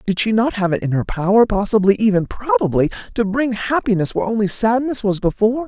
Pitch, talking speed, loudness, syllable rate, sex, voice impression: 215 Hz, 180 wpm, -18 LUFS, 6.0 syllables/s, female, very feminine, middle-aged, slightly thin, tensed, powerful, bright, slightly soft, very clear, very fluent, slightly raspy, cool, intellectual, very refreshing, sincere, calm, very friendly, reassuring, very unique, slightly elegant, wild, slightly sweet, very lively, kind, intense, light